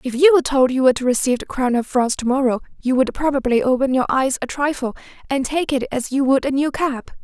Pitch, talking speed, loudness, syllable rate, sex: 265 Hz, 255 wpm, -19 LUFS, 6.5 syllables/s, female